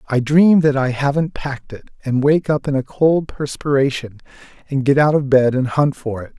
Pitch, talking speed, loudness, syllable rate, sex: 140 Hz, 215 wpm, -17 LUFS, 5.1 syllables/s, male